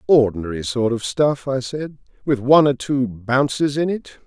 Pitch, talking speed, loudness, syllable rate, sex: 130 Hz, 185 wpm, -19 LUFS, 4.7 syllables/s, male